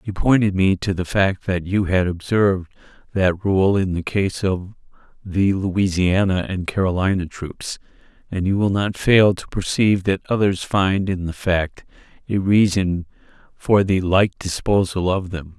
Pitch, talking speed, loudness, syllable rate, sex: 95 Hz, 160 wpm, -20 LUFS, 4.3 syllables/s, male